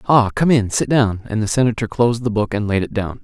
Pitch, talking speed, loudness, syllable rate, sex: 115 Hz, 280 wpm, -18 LUFS, 6.2 syllables/s, male